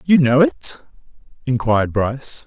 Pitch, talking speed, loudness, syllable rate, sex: 135 Hz, 120 wpm, -17 LUFS, 4.6 syllables/s, male